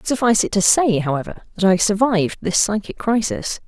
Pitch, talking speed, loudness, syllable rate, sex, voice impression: 205 Hz, 180 wpm, -18 LUFS, 5.6 syllables/s, female, feminine, adult-like, fluent, intellectual, slightly strict